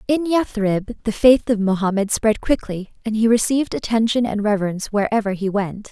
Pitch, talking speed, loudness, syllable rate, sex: 215 Hz, 175 wpm, -19 LUFS, 5.4 syllables/s, female